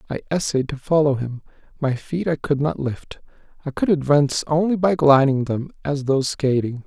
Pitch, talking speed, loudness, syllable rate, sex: 140 Hz, 185 wpm, -20 LUFS, 5.0 syllables/s, male